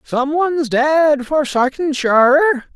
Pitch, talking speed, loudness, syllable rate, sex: 275 Hz, 110 wpm, -15 LUFS, 3.9 syllables/s, male